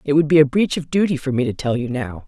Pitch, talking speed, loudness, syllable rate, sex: 140 Hz, 345 wpm, -19 LUFS, 6.5 syllables/s, female